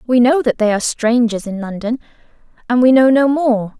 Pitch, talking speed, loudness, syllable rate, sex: 240 Hz, 190 wpm, -15 LUFS, 5.4 syllables/s, female